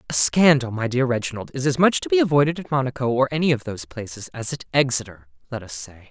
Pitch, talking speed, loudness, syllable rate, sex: 125 Hz, 235 wpm, -21 LUFS, 6.5 syllables/s, male